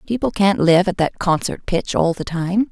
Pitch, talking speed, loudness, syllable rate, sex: 190 Hz, 220 wpm, -18 LUFS, 4.7 syllables/s, female